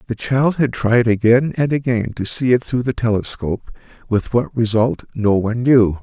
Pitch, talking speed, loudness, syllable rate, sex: 120 Hz, 190 wpm, -17 LUFS, 5.0 syllables/s, male